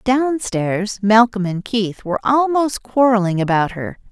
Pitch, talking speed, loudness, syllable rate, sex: 220 Hz, 145 wpm, -17 LUFS, 4.2 syllables/s, female